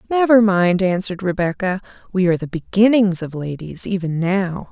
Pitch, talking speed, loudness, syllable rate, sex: 190 Hz, 155 wpm, -18 LUFS, 5.3 syllables/s, female